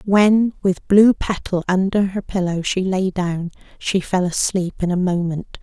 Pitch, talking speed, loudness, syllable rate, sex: 185 Hz, 170 wpm, -19 LUFS, 4.1 syllables/s, female